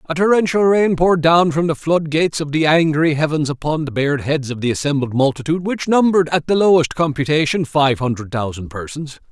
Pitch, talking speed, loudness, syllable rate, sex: 155 Hz, 195 wpm, -17 LUFS, 5.8 syllables/s, male